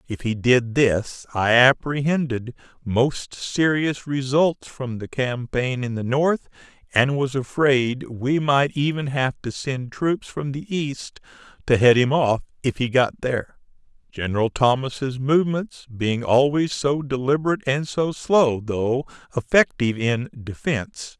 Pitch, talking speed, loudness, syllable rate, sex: 135 Hz, 140 wpm, -22 LUFS, 4.0 syllables/s, male